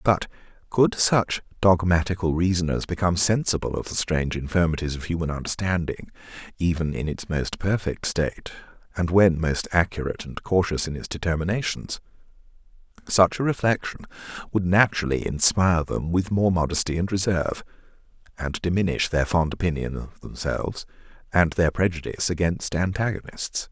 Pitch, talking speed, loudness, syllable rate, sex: 85 Hz, 135 wpm, -24 LUFS, 5.5 syllables/s, male